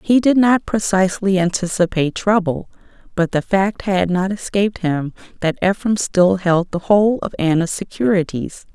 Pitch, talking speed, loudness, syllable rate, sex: 190 Hz, 150 wpm, -17 LUFS, 4.9 syllables/s, female